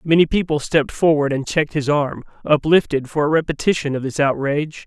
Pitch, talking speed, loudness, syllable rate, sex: 150 Hz, 185 wpm, -18 LUFS, 5.9 syllables/s, male